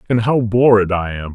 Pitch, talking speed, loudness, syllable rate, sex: 105 Hz, 225 wpm, -15 LUFS, 5.2 syllables/s, male